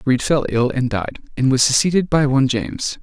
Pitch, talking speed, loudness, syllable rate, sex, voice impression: 135 Hz, 220 wpm, -17 LUFS, 5.5 syllables/s, male, very masculine, adult-like, slightly thick, cool, slightly refreshing, sincere